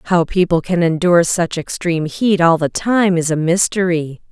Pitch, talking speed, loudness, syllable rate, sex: 170 Hz, 180 wpm, -16 LUFS, 4.8 syllables/s, female